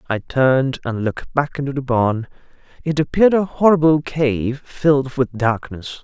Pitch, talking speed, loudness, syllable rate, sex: 135 Hz, 160 wpm, -18 LUFS, 4.8 syllables/s, male